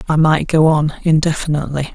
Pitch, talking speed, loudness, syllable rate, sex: 155 Hz, 155 wpm, -15 LUFS, 5.8 syllables/s, male